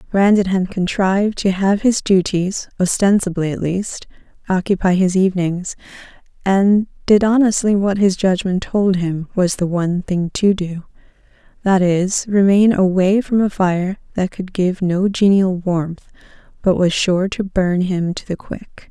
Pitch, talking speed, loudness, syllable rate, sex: 190 Hz, 155 wpm, -17 LUFS, 4.3 syllables/s, female